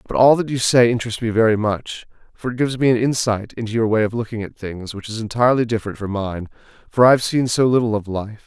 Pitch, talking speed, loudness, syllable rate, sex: 115 Hz, 255 wpm, -19 LUFS, 6.4 syllables/s, male